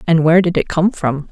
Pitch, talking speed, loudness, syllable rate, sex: 165 Hz, 275 wpm, -15 LUFS, 6.0 syllables/s, female